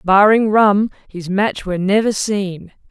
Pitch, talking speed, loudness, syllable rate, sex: 200 Hz, 145 wpm, -16 LUFS, 4.1 syllables/s, female